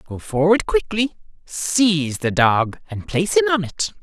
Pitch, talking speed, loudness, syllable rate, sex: 180 Hz, 165 wpm, -19 LUFS, 4.6 syllables/s, male